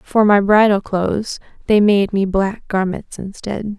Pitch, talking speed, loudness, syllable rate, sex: 200 Hz, 160 wpm, -16 LUFS, 4.0 syllables/s, female